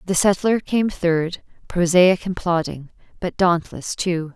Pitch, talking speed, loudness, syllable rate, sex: 175 Hz, 140 wpm, -20 LUFS, 3.8 syllables/s, female